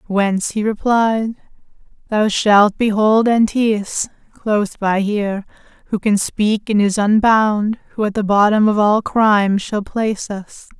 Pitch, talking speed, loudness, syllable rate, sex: 210 Hz, 145 wpm, -16 LUFS, 4.1 syllables/s, female